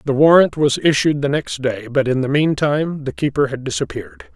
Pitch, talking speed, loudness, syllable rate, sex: 140 Hz, 205 wpm, -17 LUFS, 5.6 syllables/s, male